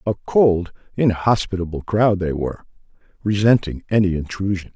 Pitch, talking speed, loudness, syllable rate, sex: 95 Hz, 115 wpm, -20 LUFS, 5.0 syllables/s, male